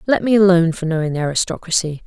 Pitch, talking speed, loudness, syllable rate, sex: 175 Hz, 205 wpm, -17 LUFS, 7.4 syllables/s, female